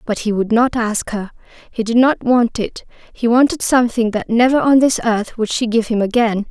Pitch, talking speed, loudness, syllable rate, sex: 230 Hz, 220 wpm, -16 LUFS, 5.0 syllables/s, female